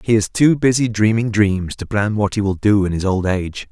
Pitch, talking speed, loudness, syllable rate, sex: 105 Hz, 260 wpm, -17 LUFS, 5.3 syllables/s, male